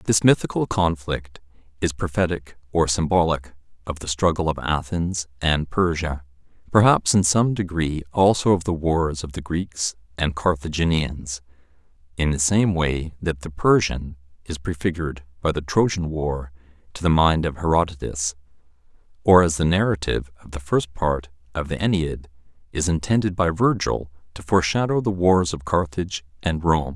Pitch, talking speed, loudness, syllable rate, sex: 80 Hz, 150 wpm, -22 LUFS, 4.9 syllables/s, male